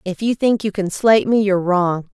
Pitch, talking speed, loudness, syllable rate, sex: 200 Hz, 250 wpm, -17 LUFS, 5.4 syllables/s, female